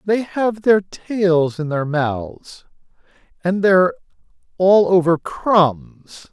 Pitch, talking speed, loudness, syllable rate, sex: 175 Hz, 105 wpm, -17 LUFS, 2.9 syllables/s, male